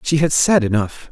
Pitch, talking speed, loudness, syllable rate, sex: 135 Hz, 215 wpm, -16 LUFS, 5.0 syllables/s, male